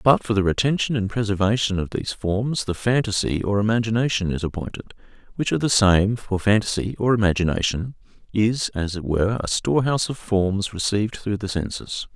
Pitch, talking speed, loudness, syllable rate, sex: 105 Hz, 175 wpm, -22 LUFS, 5.7 syllables/s, male